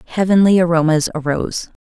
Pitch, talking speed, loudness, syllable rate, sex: 170 Hz, 100 wpm, -15 LUFS, 6.0 syllables/s, female